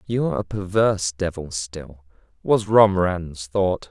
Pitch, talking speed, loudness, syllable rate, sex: 90 Hz, 125 wpm, -21 LUFS, 4.1 syllables/s, male